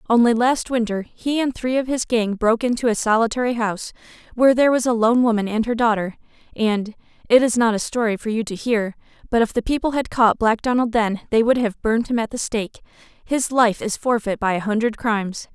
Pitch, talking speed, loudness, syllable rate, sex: 230 Hz, 220 wpm, -20 LUFS, 5.8 syllables/s, female